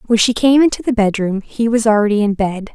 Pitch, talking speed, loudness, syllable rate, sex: 220 Hz, 240 wpm, -15 LUFS, 5.8 syllables/s, female